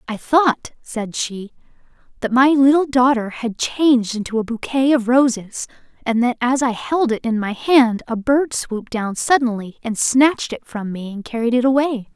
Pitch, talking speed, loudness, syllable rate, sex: 245 Hz, 190 wpm, -18 LUFS, 4.7 syllables/s, female